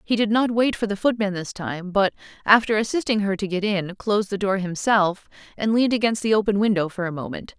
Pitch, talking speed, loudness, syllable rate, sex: 205 Hz, 230 wpm, -22 LUFS, 5.9 syllables/s, female